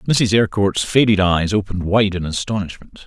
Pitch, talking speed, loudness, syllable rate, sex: 100 Hz, 155 wpm, -17 LUFS, 5.3 syllables/s, male